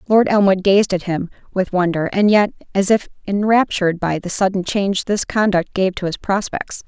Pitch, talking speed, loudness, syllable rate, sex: 195 Hz, 190 wpm, -18 LUFS, 5.1 syllables/s, female